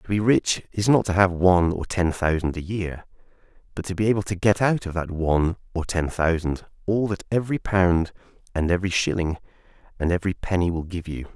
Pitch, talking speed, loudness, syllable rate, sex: 90 Hz, 205 wpm, -23 LUFS, 5.8 syllables/s, male